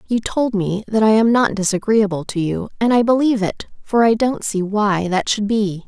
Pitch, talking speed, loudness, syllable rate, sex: 210 Hz, 215 wpm, -17 LUFS, 4.8 syllables/s, female